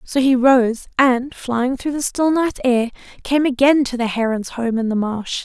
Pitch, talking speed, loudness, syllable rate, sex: 255 Hz, 210 wpm, -18 LUFS, 4.3 syllables/s, female